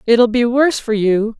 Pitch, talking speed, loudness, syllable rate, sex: 230 Hz, 215 wpm, -15 LUFS, 4.8 syllables/s, female